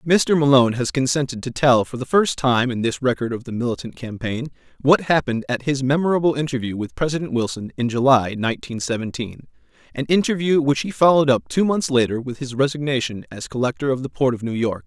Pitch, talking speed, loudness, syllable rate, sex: 135 Hz, 200 wpm, -20 LUFS, 6.1 syllables/s, male